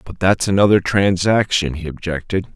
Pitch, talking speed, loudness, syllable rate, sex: 90 Hz, 140 wpm, -17 LUFS, 5.0 syllables/s, male